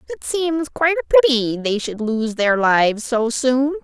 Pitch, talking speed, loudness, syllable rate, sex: 265 Hz, 190 wpm, -18 LUFS, 4.7 syllables/s, female